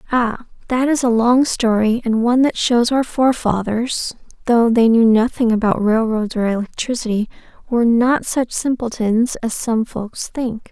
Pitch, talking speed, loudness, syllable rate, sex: 235 Hz, 155 wpm, -17 LUFS, 3.3 syllables/s, female